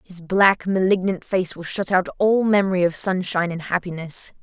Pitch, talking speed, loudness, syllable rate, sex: 185 Hz, 175 wpm, -21 LUFS, 5.1 syllables/s, female